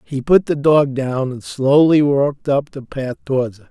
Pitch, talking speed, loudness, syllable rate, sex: 140 Hz, 210 wpm, -17 LUFS, 4.6 syllables/s, male